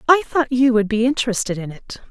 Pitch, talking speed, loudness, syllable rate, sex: 240 Hz, 230 wpm, -18 LUFS, 5.9 syllables/s, female